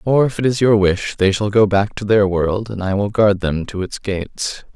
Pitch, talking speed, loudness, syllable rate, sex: 100 Hz, 265 wpm, -17 LUFS, 4.8 syllables/s, male